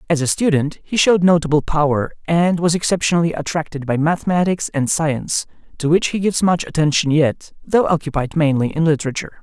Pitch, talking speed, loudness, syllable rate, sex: 160 Hz, 170 wpm, -17 LUFS, 6.0 syllables/s, male